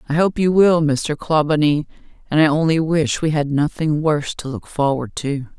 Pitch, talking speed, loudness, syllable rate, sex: 155 Hz, 195 wpm, -18 LUFS, 4.9 syllables/s, female